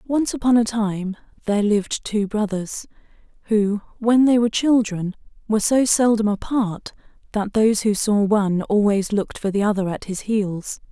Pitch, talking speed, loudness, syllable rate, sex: 210 Hz, 165 wpm, -20 LUFS, 5.0 syllables/s, female